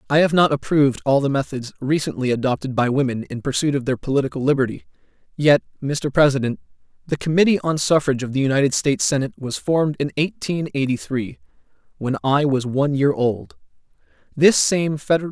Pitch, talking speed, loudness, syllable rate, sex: 140 Hz, 170 wpm, -20 LUFS, 6.1 syllables/s, male